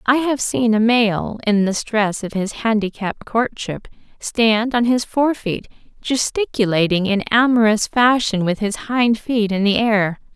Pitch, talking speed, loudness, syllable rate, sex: 220 Hz, 160 wpm, -18 LUFS, 4.0 syllables/s, female